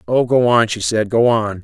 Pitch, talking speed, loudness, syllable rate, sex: 115 Hz, 260 wpm, -15 LUFS, 4.8 syllables/s, male